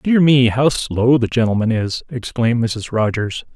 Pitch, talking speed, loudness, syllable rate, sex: 120 Hz, 150 wpm, -17 LUFS, 4.5 syllables/s, male